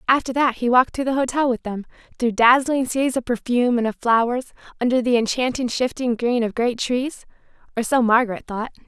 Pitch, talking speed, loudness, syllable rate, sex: 245 Hz, 190 wpm, -20 LUFS, 5.6 syllables/s, female